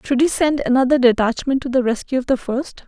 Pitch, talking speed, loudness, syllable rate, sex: 260 Hz, 230 wpm, -18 LUFS, 5.8 syllables/s, female